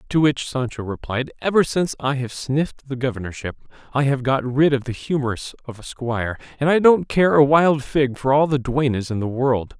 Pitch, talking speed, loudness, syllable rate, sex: 135 Hz, 215 wpm, -20 LUFS, 5.2 syllables/s, male